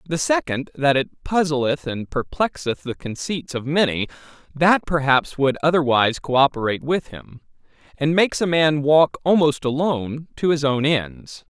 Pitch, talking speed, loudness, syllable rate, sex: 145 Hz, 150 wpm, -20 LUFS, 4.7 syllables/s, male